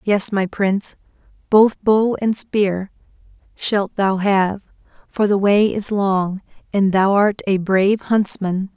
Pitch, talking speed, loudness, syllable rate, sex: 200 Hz, 145 wpm, -18 LUFS, 3.6 syllables/s, female